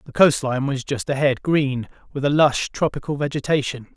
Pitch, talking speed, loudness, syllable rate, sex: 140 Hz, 165 wpm, -21 LUFS, 5.4 syllables/s, male